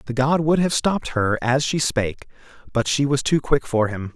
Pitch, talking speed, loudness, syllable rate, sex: 135 Hz, 230 wpm, -21 LUFS, 5.1 syllables/s, male